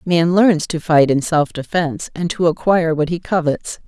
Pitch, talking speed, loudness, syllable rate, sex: 165 Hz, 200 wpm, -17 LUFS, 4.9 syllables/s, female